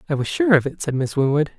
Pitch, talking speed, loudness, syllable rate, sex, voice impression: 155 Hz, 300 wpm, -20 LUFS, 6.5 syllables/s, male, masculine, adult-like, slightly fluent, refreshing, slightly sincere, lively